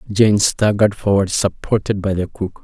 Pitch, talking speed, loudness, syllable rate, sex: 100 Hz, 160 wpm, -17 LUFS, 4.9 syllables/s, male